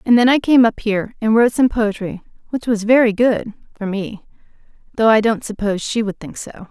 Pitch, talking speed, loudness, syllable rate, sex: 220 Hz, 215 wpm, -17 LUFS, 5.9 syllables/s, female